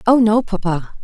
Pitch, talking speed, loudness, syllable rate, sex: 210 Hz, 175 wpm, -17 LUFS, 4.8 syllables/s, female